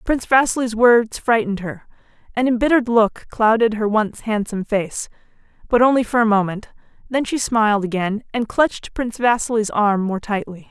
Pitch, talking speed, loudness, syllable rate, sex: 225 Hz, 165 wpm, -18 LUFS, 5.4 syllables/s, female